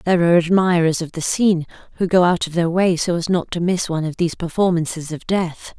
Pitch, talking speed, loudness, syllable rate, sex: 170 Hz, 240 wpm, -19 LUFS, 6.2 syllables/s, female